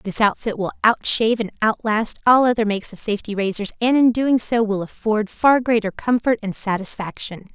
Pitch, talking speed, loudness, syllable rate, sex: 220 Hz, 200 wpm, -19 LUFS, 5.4 syllables/s, female